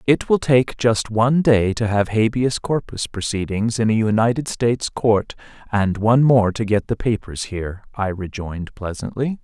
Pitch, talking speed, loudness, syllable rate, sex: 110 Hz, 170 wpm, -20 LUFS, 4.8 syllables/s, male